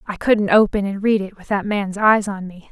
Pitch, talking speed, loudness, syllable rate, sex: 200 Hz, 265 wpm, -18 LUFS, 5.1 syllables/s, female